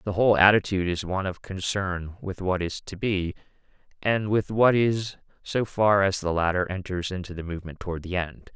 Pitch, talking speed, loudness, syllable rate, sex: 95 Hz, 195 wpm, -25 LUFS, 5.4 syllables/s, male